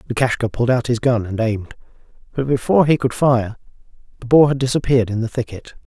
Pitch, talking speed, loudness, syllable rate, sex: 125 Hz, 195 wpm, -18 LUFS, 6.5 syllables/s, male